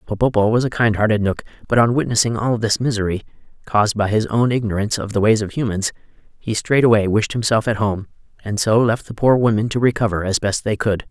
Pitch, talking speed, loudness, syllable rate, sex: 110 Hz, 215 wpm, -18 LUFS, 6.0 syllables/s, male